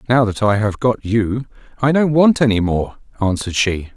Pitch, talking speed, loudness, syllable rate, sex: 115 Hz, 195 wpm, -17 LUFS, 5.0 syllables/s, male